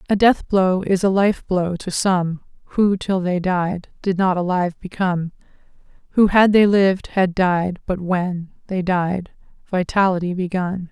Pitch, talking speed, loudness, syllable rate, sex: 185 Hz, 160 wpm, -19 LUFS, 4.3 syllables/s, female